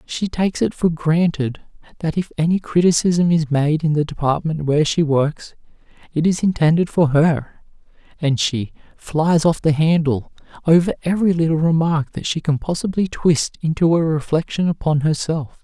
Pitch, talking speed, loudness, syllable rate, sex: 160 Hz, 160 wpm, -18 LUFS, 4.9 syllables/s, male